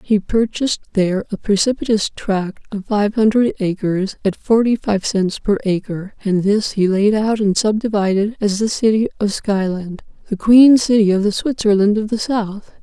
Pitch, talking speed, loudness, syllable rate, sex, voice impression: 210 Hz, 170 wpm, -17 LUFS, 4.7 syllables/s, female, feminine, middle-aged, relaxed, slightly weak, soft, halting, intellectual, calm, slightly friendly, slightly reassuring, kind, modest